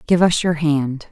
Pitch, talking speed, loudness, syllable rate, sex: 155 Hz, 215 wpm, -17 LUFS, 4.1 syllables/s, female